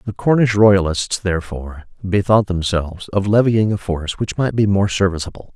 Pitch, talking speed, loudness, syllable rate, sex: 95 Hz, 160 wpm, -17 LUFS, 5.3 syllables/s, male